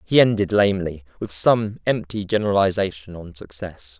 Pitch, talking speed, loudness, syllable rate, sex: 100 Hz, 135 wpm, -21 LUFS, 5.2 syllables/s, male